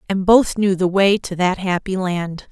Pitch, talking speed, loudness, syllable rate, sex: 190 Hz, 215 wpm, -17 LUFS, 4.3 syllables/s, female